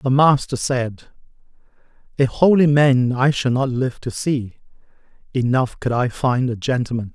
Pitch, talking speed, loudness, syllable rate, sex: 130 Hz, 150 wpm, -19 LUFS, 4.3 syllables/s, male